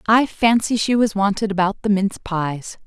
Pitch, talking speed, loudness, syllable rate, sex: 205 Hz, 190 wpm, -19 LUFS, 4.9 syllables/s, female